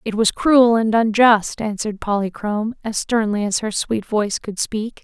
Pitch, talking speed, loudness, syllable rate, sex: 215 Hz, 180 wpm, -18 LUFS, 4.8 syllables/s, female